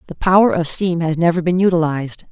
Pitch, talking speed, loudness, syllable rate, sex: 170 Hz, 205 wpm, -16 LUFS, 6.1 syllables/s, female